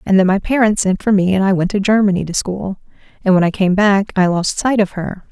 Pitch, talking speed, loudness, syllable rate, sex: 195 Hz, 270 wpm, -15 LUFS, 5.8 syllables/s, female